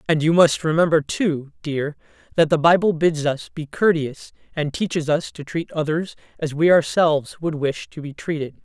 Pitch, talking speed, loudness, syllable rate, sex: 155 Hz, 190 wpm, -20 LUFS, 4.8 syllables/s, female